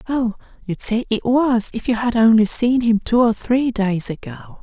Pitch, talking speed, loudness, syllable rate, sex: 225 Hz, 210 wpm, -18 LUFS, 4.7 syllables/s, male